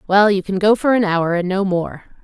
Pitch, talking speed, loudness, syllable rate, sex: 195 Hz, 270 wpm, -17 LUFS, 5.0 syllables/s, female